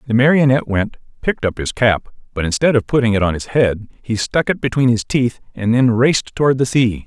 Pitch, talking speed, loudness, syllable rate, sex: 120 Hz, 220 wpm, -16 LUFS, 5.9 syllables/s, male